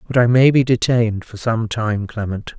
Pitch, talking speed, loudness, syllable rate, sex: 115 Hz, 210 wpm, -17 LUFS, 5.0 syllables/s, male